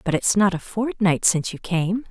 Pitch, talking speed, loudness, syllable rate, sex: 195 Hz, 230 wpm, -21 LUFS, 5.1 syllables/s, female